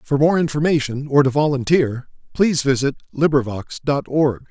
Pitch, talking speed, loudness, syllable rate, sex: 140 Hz, 145 wpm, -19 LUFS, 5.1 syllables/s, male